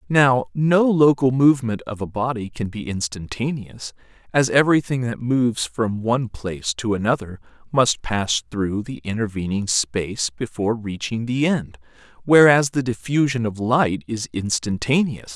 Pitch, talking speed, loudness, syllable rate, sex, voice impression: 120 Hz, 140 wpm, -21 LUFS, 4.6 syllables/s, male, masculine, adult-like, thick, tensed, slightly powerful, clear, intellectual, calm, slightly friendly, reassuring, slightly wild, lively